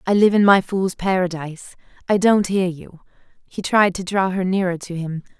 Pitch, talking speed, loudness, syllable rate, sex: 185 Hz, 200 wpm, -19 LUFS, 5.1 syllables/s, female